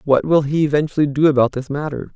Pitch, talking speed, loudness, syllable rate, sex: 145 Hz, 225 wpm, -17 LUFS, 6.3 syllables/s, male